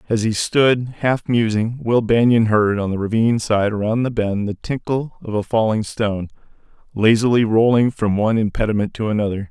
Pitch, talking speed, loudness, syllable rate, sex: 110 Hz, 175 wpm, -18 LUFS, 5.3 syllables/s, male